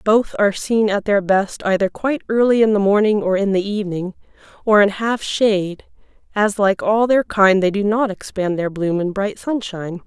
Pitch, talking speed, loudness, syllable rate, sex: 205 Hz, 205 wpm, -18 LUFS, 5.1 syllables/s, female